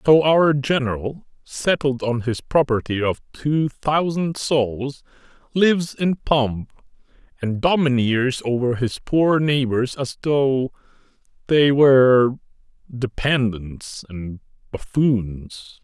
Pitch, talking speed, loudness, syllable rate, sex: 130 Hz, 100 wpm, -20 LUFS, 3.4 syllables/s, male